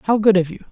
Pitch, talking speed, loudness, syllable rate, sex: 195 Hz, 335 wpm, -16 LUFS, 6.3 syllables/s, female